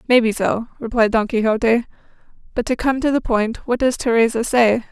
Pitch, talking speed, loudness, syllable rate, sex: 235 Hz, 195 wpm, -18 LUFS, 5.4 syllables/s, female